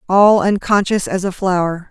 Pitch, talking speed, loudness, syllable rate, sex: 190 Hz, 155 wpm, -15 LUFS, 4.6 syllables/s, female